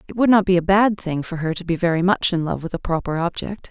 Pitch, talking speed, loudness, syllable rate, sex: 180 Hz, 310 wpm, -20 LUFS, 6.2 syllables/s, female